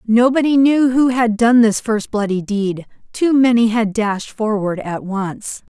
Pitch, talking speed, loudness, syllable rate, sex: 225 Hz, 165 wpm, -16 LUFS, 4.0 syllables/s, female